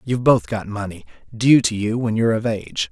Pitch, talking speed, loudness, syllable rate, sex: 115 Hz, 205 wpm, -19 LUFS, 5.9 syllables/s, male